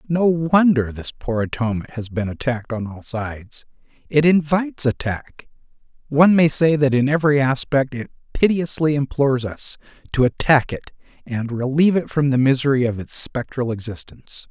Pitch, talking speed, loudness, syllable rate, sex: 135 Hz, 155 wpm, -19 LUFS, 5.2 syllables/s, male